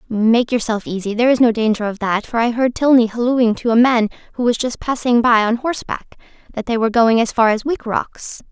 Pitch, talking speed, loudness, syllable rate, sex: 235 Hz, 235 wpm, -16 LUFS, 5.7 syllables/s, female